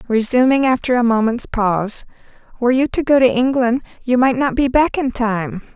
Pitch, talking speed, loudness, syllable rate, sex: 245 Hz, 190 wpm, -16 LUFS, 5.2 syllables/s, female